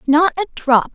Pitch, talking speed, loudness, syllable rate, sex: 315 Hz, 190 wpm, -16 LUFS, 4.6 syllables/s, female